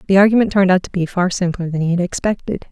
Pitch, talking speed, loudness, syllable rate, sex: 185 Hz, 265 wpm, -17 LUFS, 7.2 syllables/s, female